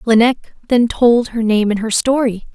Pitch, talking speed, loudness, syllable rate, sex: 230 Hz, 190 wpm, -15 LUFS, 4.5 syllables/s, female